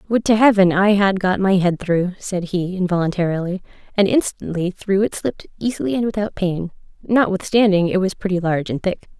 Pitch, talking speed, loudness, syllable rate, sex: 190 Hz, 185 wpm, -19 LUFS, 5.5 syllables/s, female